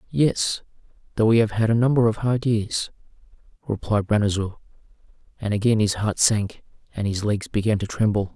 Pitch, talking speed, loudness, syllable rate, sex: 110 Hz, 165 wpm, -22 LUFS, 5.2 syllables/s, male